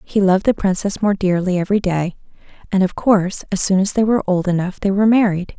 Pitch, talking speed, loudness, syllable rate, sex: 195 Hz, 225 wpm, -17 LUFS, 6.3 syllables/s, female